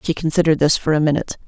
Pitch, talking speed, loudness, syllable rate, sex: 155 Hz, 245 wpm, -17 LUFS, 8.4 syllables/s, female